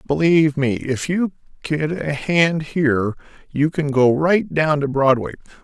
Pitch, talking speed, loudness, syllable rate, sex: 150 Hz, 160 wpm, -19 LUFS, 4.2 syllables/s, male